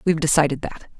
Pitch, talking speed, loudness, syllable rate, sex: 155 Hz, 180 wpm, -20 LUFS, 7.5 syllables/s, female